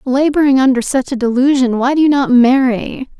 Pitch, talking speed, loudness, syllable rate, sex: 260 Hz, 190 wpm, -13 LUFS, 5.3 syllables/s, female